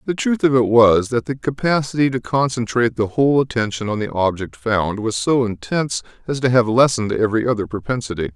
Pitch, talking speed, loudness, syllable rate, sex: 120 Hz, 195 wpm, -18 LUFS, 5.9 syllables/s, male